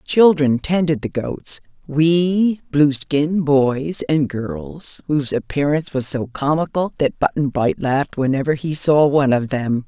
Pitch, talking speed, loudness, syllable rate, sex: 145 Hz, 140 wpm, -18 LUFS, 4.1 syllables/s, female